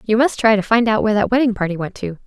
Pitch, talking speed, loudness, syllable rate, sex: 215 Hz, 320 wpm, -17 LUFS, 7.2 syllables/s, female